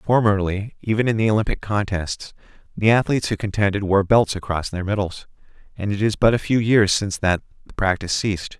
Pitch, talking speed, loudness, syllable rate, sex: 100 Hz, 190 wpm, -20 LUFS, 5.8 syllables/s, male